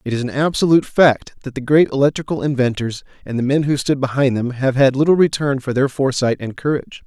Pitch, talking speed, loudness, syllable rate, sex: 135 Hz, 220 wpm, -17 LUFS, 6.2 syllables/s, male